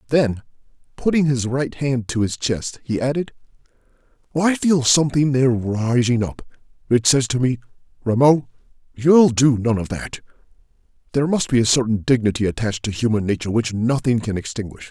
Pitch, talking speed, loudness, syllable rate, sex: 125 Hz, 155 wpm, -19 LUFS, 5.5 syllables/s, male